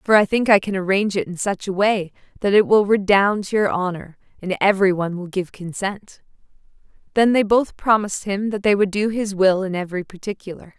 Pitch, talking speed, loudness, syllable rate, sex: 195 Hz, 210 wpm, -19 LUFS, 5.7 syllables/s, female